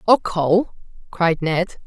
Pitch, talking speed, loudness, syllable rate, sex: 180 Hz, 130 wpm, -19 LUFS, 3.7 syllables/s, female